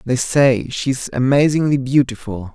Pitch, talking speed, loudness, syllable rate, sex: 130 Hz, 140 wpm, -17 LUFS, 4.6 syllables/s, male